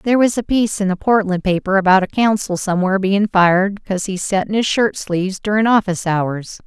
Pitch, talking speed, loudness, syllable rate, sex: 195 Hz, 215 wpm, -17 LUFS, 6.1 syllables/s, female